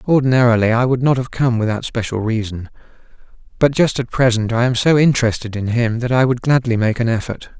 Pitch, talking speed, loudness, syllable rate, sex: 120 Hz, 205 wpm, -16 LUFS, 6.0 syllables/s, male